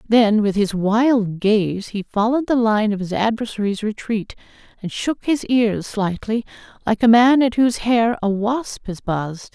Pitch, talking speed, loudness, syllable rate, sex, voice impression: 220 Hz, 175 wpm, -19 LUFS, 4.4 syllables/s, female, feminine, slightly middle-aged, slightly powerful, slightly hard, slightly raspy, intellectual, calm, reassuring, elegant, slightly strict, slightly sharp, modest